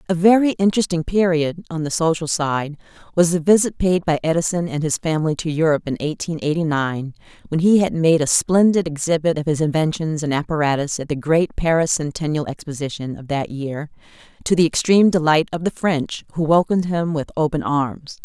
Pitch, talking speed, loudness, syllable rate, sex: 160 Hz, 190 wpm, -19 LUFS, 5.6 syllables/s, female